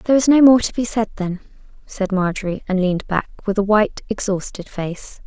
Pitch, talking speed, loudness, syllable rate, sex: 205 Hz, 205 wpm, -19 LUFS, 5.6 syllables/s, female